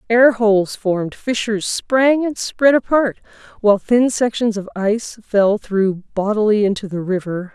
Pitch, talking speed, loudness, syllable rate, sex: 215 Hz, 150 wpm, -17 LUFS, 4.5 syllables/s, female